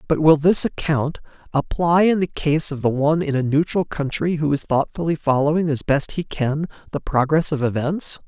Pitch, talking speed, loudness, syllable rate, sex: 150 Hz, 195 wpm, -20 LUFS, 5.1 syllables/s, male